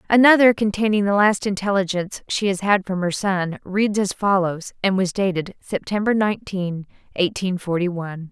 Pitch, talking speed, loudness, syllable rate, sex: 195 Hz, 160 wpm, -20 LUFS, 5.1 syllables/s, female